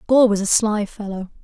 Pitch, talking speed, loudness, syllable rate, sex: 210 Hz, 210 wpm, -19 LUFS, 5.2 syllables/s, female